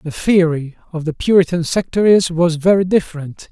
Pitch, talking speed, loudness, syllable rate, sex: 170 Hz, 155 wpm, -15 LUFS, 5.3 syllables/s, male